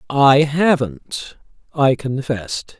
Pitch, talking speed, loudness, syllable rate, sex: 135 Hz, 85 wpm, -18 LUFS, 3.1 syllables/s, male